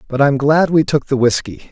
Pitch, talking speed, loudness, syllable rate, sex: 135 Hz, 245 wpm, -15 LUFS, 5.2 syllables/s, male